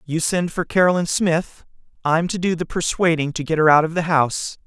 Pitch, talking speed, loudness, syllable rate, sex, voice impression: 165 Hz, 220 wpm, -19 LUFS, 5.6 syllables/s, male, masculine, adult-like, tensed, powerful, bright, clear, fluent, cool, intellectual, friendly, reassuring, wild, lively